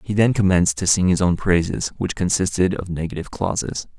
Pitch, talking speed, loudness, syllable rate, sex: 90 Hz, 195 wpm, -20 LUFS, 5.9 syllables/s, male